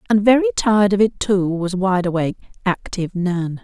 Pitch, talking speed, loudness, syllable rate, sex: 195 Hz, 180 wpm, -18 LUFS, 5.6 syllables/s, female